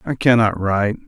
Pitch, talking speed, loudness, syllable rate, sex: 110 Hz, 165 wpm, -17 LUFS, 5.8 syllables/s, male